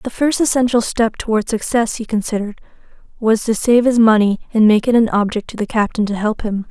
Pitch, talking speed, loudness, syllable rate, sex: 220 Hz, 215 wpm, -16 LUFS, 5.8 syllables/s, female